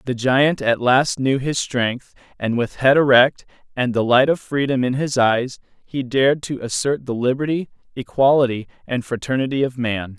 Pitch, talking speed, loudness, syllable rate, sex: 130 Hz, 175 wpm, -19 LUFS, 4.8 syllables/s, male